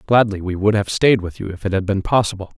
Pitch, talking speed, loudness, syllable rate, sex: 100 Hz, 280 wpm, -18 LUFS, 6.3 syllables/s, male